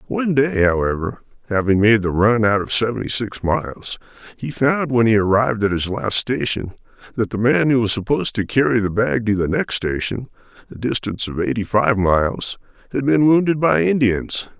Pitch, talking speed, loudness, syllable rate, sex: 115 Hz, 190 wpm, -18 LUFS, 5.3 syllables/s, male